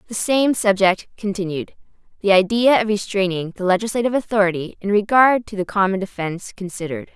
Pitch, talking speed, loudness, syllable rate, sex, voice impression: 200 Hz, 150 wpm, -19 LUFS, 1.6 syllables/s, female, feminine, slightly young, slightly fluent, slightly intellectual, slightly unique